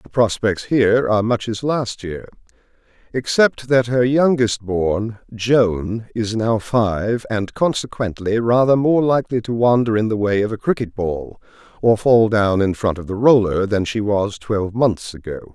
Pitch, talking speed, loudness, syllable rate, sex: 110 Hz, 175 wpm, -18 LUFS, 4.4 syllables/s, male